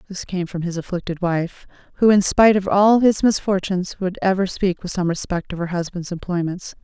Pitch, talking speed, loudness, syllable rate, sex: 185 Hz, 200 wpm, -20 LUFS, 5.5 syllables/s, female